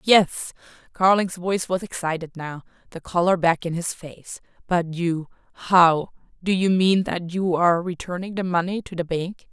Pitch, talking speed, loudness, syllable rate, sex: 175 Hz, 160 wpm, -22 LUFS, 4.7 syllables/s, female